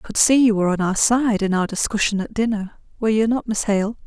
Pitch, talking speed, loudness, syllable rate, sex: 215 Hz, 250 wpm, -19 LUFS, 6.1 syllables/s, female